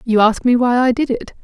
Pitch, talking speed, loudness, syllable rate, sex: 240 Hz, 290 wpm, -15 LUFS, 5.5 syllables/s, female